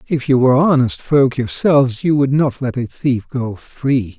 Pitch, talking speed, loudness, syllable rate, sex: 130 Hz, 200 wpm, -16 LUFS, 4.5 syllables/s, male